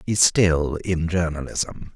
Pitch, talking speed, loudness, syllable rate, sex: 85 Hz, 125 wpm, -21 LUFS, 3.3 syllables/s, male